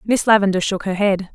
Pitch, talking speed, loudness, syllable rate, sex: 200 Hz, 225 wpm, -17 LUFS, 5.7 syllables/s, female